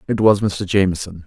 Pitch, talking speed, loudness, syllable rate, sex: 95 Hz, 190 wpm, -18 LUFS, 5.4 syllables/s, male